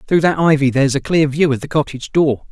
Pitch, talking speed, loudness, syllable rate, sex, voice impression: 145 Hz, 260 wpm, -16 LUFS, 6.4 syllables/s, male, masculine, adult-like, slightly middle-aged, slightly thick, slightly relaxed, slightly weak, slightly soft, clear, fluent, cool, intellectual, very refreshing, sincere, calm, slightly mature, friendly, reassuring, slightly unique, elegant, slightly wild, sweet, lively, kind, slightly intense